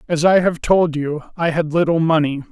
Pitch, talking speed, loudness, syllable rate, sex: 160 Hz, 215 wpm, -17 LUFS, 5.1 syllables/s, male